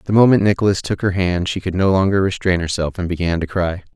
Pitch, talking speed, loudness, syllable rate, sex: 90 Hz, 245 wpm, -18 LUFS, 6.2 syllables/s, male